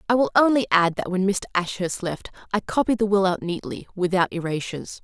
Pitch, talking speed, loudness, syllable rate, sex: 195 Hz, 205 wpm, -23 LUFS, 5.8 syllables/s, female